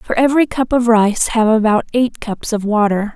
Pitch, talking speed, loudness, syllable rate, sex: 225 Hz, 210 wpm, -15 LUFS, 5.0 syllables/s, female